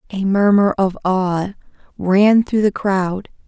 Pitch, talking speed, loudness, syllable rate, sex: 195 Hz, 140 wpm, -16 LUFS, 3.5 syllables/s, female